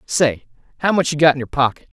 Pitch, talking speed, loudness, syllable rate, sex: 145 Hz, 240 wpm, -18 LUFS, 6.3 syllables/s, male